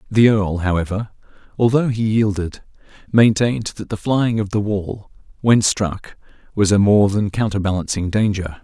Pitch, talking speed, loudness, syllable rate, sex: 105 Hz, 145 wpm, -18 LUFS, 4.7 syllables/s, male